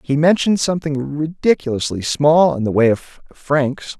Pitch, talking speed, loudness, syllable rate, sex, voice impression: 145 Hz, 150 wpm, -17 LUFS, 5.0 syllables/s, male, masculine, adult-like, tensed, slightly powerful, clear, fluent, cool, intellectual, sincere, wild, lively, slightly strict